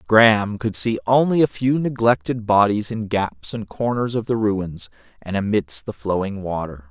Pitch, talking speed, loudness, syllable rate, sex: 105 Hz, 175 wpm, -20 LUFS, 4.6 syllables/s, male